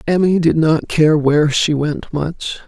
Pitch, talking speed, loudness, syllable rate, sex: 155 Hz, 180 wpm, -15 LUFS, 4.0 syllables/s, female